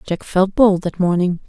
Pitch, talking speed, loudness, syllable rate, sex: 185 Hz, 205 wpm, -17 LUFS, 4.6 syllables/s, female